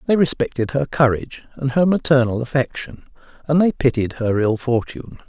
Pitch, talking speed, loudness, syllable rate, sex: 135 Hz, 160 wpm, -19 LUFS, 5.6 syllables/s, male